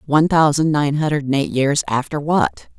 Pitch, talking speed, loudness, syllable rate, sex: 150 Hz, 170 wpm, -18 LUFS, 4.7 syllables/s, female